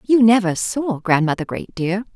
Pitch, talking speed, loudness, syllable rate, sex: 200 Hz, 165 wpm, -18 LUFS, 4.7 syllables/s, female